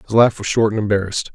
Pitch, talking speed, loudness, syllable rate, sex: 105 Hz, 270 wpm, -17 LUFS, 6.9 syllables/s, male